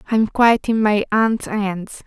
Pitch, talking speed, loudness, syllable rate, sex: 215 Hz, 175 wpm, -18 LUFS, 4.0 syllables/s, female